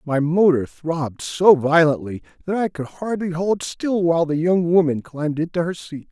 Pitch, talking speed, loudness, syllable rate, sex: 165 Hz, 185 wpm, -20 LUFS, 4.9 syllables/s, male